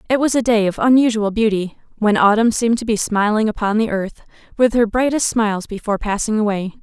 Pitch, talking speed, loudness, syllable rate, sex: 220 Hz, 200 wpm, -17 LUFS, 6.0 syllables/s, female